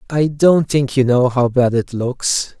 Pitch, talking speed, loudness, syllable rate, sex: 130 Hz, 210 wpm, -16 LUFS, 3.8 syllables/s, male